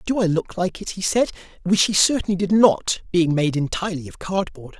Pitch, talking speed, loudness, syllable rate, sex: 180 Hz, 215 wpm, -20 LUFS, 2.3 syllables/s, male